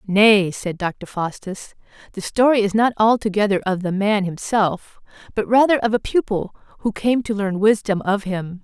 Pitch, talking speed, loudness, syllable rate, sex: 205 Hz, 175 wpm, -19 LUFS, 4.6 syllables/s, female